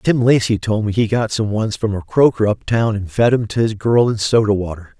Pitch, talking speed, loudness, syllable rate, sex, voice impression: 110 Hz, 250 wpm, -17 LUFS, 5.3 syllables/s, male, masculine, adult-like, slightly weak, fluent, intellectual, sincere, slightly friendly, reassuring, kind, slightly modest